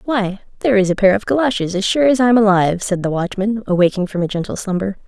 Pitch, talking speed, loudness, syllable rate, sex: 205 Hz, 235 wpm, -16 LUFS, 6.5 syllables/s, female